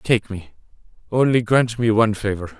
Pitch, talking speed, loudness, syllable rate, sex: 110 Hz, 160 wpm, -19 LUFS, 5.1 syllables/s, male